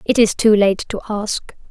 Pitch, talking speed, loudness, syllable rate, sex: 210 Hz, 210 wpm, -17 LUFS, 4.5 syllables/s, female